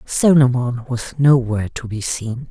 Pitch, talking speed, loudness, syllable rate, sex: 125 Hz, 145 wpm, -18 LUFS, 4.4 syllables/s, female